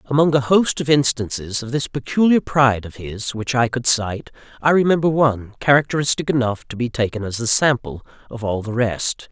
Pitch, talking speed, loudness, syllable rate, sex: 125 Hz, 195 wpm, -19 LUFS, 5.4 syllables/s, male